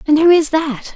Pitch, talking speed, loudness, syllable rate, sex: 300 Hz, 250 wpm, -13 LUFS, 4.7 syllables/s, female